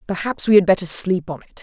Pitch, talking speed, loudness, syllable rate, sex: 185 Hz, 260 wpm, -18 LUFS, 6.4 syllables/s, female